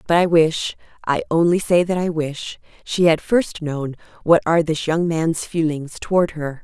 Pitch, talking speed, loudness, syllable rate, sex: 165 Hz, 170 wpm, -19 LUFS, 4.6 syllables/s, female